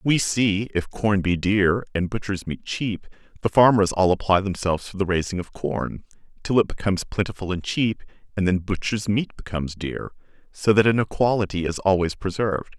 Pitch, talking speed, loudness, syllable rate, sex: 100 Hz, 185 wpm, -23 LUFS, 5.2 syllables/s, male